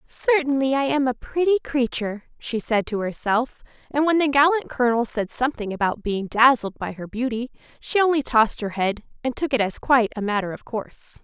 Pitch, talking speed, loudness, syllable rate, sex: 250 Hz, 200 wpm, -22 LUFS, 5.5 syllables/s, female